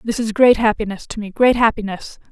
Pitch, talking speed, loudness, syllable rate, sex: 220 Hz, 205 wpm, -17 LUFS, 5.7 syllables/s, female